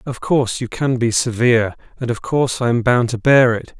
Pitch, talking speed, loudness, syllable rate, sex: 120 Hz, 235 wpm, -17 LUFS, 5.6 syllables/s, male